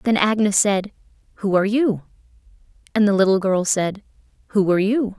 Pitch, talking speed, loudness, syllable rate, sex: 205 Hz, 160 wpm, -19 LUFS, 5.7 syllables/s, female